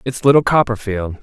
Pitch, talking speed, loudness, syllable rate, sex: 120 Hz, 145 wpm, -15 LUFS, 5.4 syllables/s, male